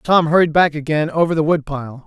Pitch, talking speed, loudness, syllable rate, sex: 155 Hz, 235 wpm, -16 LUFS, 5.4 syllables/s, male